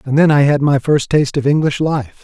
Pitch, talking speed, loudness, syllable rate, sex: 140 Hz, 270 wpm, -14 LUFS, 5.7 syllables/s, male